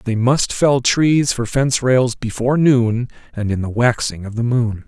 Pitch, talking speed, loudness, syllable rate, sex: 120 Hz, 195 wpm, -17 LUFS, 4.5 syllables/s, male